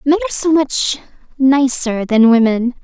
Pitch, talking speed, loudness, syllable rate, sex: 270 Hz, 150 wpm, -14 LUFS, 4.6 syllables/s, female